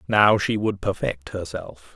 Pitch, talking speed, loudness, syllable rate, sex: 95 Hz, 155 wpm, -23 LUFS, 3.9 syllables/s, male